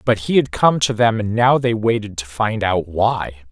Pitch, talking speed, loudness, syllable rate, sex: 110 Hz, 240 wpm, -18 LUFS, 4.6 syllables/s, male